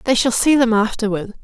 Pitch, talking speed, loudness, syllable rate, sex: 225 Hz, 210 wpm, -16 LUFS, 5.7 syllables/s, female